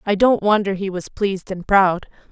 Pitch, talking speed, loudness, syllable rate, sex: 195 Hz, 210 wpm, -19 LUFS, 5.0 syllables/s, female